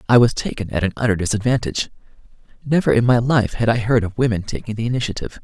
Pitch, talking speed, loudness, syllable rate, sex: 110 Hz, 210 wpm, -19 LUFS, 7.1 syllables/s, male